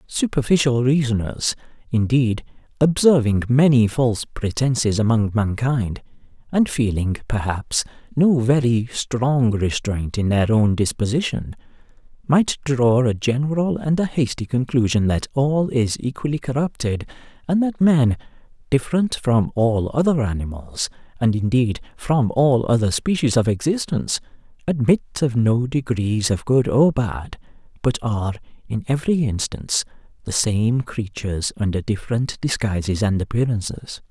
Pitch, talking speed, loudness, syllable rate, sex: 120 Hz, 125 wpm, -20 LUFS, 4.6 syllables/s, male